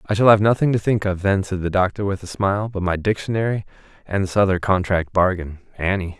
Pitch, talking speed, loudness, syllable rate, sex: 95 Hz, 215 wpm, -20 LUFS, 6.1 syllables/s, male